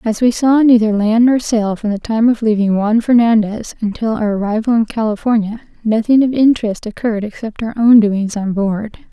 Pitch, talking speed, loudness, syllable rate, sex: 220 Hz, 190 wpm, -14 LUFS, 5.4 syllables/s, female